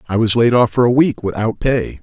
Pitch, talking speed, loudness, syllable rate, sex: 115 Hz, 265 wpm, -15 LUFS, 5.4 syllables/s, male